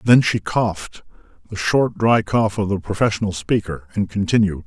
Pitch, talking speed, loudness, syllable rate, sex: 100 Hz, 140 wpm, -19 LUFS, 5.0 syllables/s, male